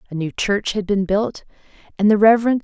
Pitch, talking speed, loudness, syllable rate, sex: 205 Hz, 205 wpm, -18 LUFS, 4.8 syllables/s, female